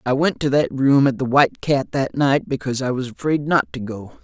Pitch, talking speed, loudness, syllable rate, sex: 130 Hz, 255 wpm, -19 LUFS, 5.4 syllables/s, male